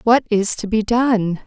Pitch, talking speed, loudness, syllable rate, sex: 220 Hz, 205 wpm, -17 LUFS, 3.9 syllables/s, female